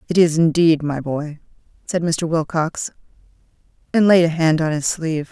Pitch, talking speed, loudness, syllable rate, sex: 160 Hz, 170 wpm, -18 LUFS, 4.9 syllables/s, female